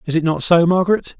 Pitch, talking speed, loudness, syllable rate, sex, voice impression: 170 Hz, 250 wpm, -16 LUFS, 6.5 syllables/s, male, very masculine, very adult-like, middle-aged, slightly tensed, powerful, dark, hard, slightly muffled, slightly halting, very cool, very intellectual, very sincere, very calm, very mature, friendly, very reassuring, unique, elegant, very wild, sweet, slightly lively, very kind, slightly modest